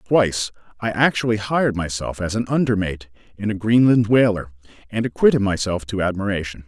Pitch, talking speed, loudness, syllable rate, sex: 105 Hz, 160 wpm, -20 LUFS, 5.7 syllables/s, male